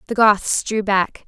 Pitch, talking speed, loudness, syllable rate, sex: 205 Hz, 190 wpm, -18 LUFS, 3.7 syllables/s, female